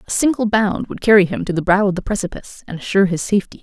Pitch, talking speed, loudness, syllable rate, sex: 195 Hz, 265 wpm, -17 LUFS, 7.3 syllables/s, female